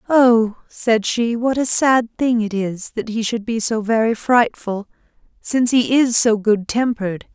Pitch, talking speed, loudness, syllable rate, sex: 230 Hz, 180 wpm, -18 LUFS, 4.1 syllables/s, female